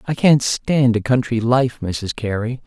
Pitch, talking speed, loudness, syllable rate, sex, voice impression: 120 Hz, 180 wpm, -18 LUFS, 4.1 syllables/s, male, masculine, middle-aged, tensed, slightly weak, soft, cool, intellectual, calm, mature, friendly, reassuring, wild, lively, kind